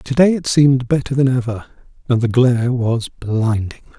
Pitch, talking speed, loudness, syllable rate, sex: 125 Hz, 180 wpm, -16 LUFS, 5.3 syllables/s, male